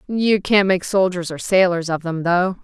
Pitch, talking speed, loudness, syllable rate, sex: 180 Hz, 205 wpm, -18 LUFS, 4.5 syllables/s, female